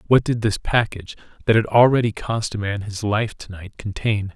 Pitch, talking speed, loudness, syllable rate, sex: 110 Hz, 205 wpm, -21 LUFS, 5.2 syllables/s, male